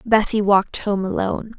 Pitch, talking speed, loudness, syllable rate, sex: 205 Hz, 150 wpm, -19 LUFS, 5.4 syllables/s, female